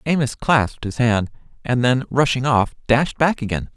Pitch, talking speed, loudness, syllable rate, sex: 125 Hz, 175 wpm, -19 LUFS, 4.8 syllables/s, male